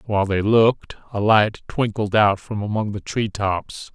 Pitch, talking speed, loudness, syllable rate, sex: 105 Hz, 180 wpm, -20 LUFS, 4.5 syllables/s, male